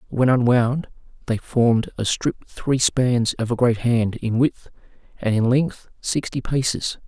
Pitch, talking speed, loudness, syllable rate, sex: 120 Hz, 160 wpm, -21 LUFS, 4.0 syllables/s, male